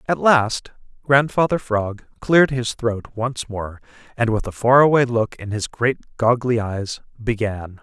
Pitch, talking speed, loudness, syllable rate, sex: 115 Hz, 160 wpm, -20 LUFS, 4.0 syllables/s, male